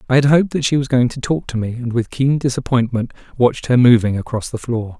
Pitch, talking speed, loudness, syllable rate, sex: 125 Hz, 250 wpm, -17 LUFS, 6.1 syllables/s, male